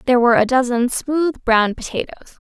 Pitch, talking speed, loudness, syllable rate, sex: 250 Hz, 170 wpm, -17 LUFS, 6.0 syllables/s, female